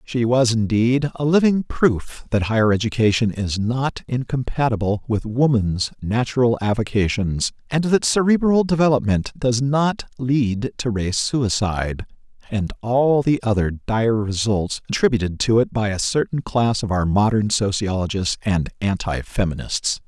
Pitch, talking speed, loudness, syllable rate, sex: 115 Hz, 140 wpm, -20 LUFS, 4.4 syllables/s, male